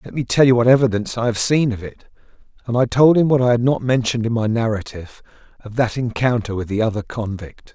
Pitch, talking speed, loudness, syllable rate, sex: 115 Hz, 230 wpm, -18 LUFS, 6.3 syllables/s, male